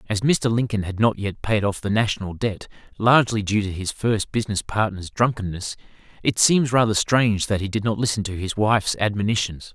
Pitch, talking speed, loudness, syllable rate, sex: 105 Hz, 195 wpm, -22 LUFS, 5.5 syllables/s, male